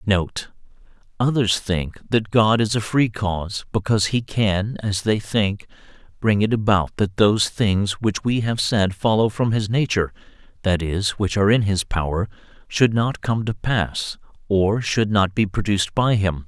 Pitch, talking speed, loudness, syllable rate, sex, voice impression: 105 Hz, 165 wpm, -21 LUFS, 4.4 syllables/s, male, masculine, adult-like, refreshing, sincere